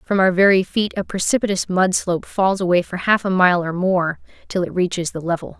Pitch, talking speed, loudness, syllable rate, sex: 185 Hz, 225 wpm, -19 LUFS, 5.5 syllables/s, female